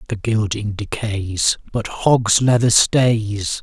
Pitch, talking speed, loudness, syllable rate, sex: 110 Hz, 115 wpm, -18 LUFS, 3.1 syllables/s, male